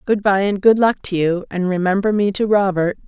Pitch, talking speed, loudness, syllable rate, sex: 195 Hz, 235 wpm, -17 LUFS, 5.3 syllables/s, female